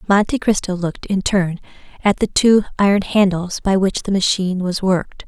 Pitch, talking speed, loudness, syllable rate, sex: 190 Hz, 180 wpm, -17 LUFS, 5.3 syllables/s, female